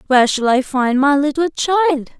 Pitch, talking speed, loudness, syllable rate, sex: 280 Hz, 190 wpm, -15 LUFS, 4.6 syllables/s, female